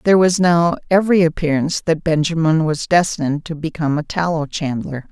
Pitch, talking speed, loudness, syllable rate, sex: 160 Hz, 165 wpm, -17 LUFS, 5.8 syllables/s, female